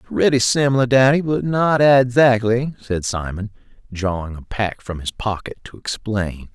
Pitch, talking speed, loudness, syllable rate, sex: 115 Hz, 145 wpm, -18 LUFS, 4.8 syllables/s, male